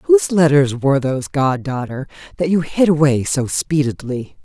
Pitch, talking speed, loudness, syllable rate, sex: 145 Hz, 160 wpm, -17 LUFS, 4.9 syllables/s, female